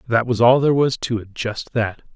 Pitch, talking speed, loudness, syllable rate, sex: 120 Hz, 225 wpm, -19 LUFS, 5.3 syllables/s, male